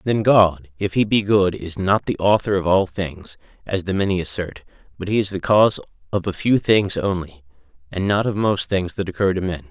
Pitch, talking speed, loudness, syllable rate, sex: 95 Hz, 225 wpm, -20 LUFS, 5.2 syllables/s, male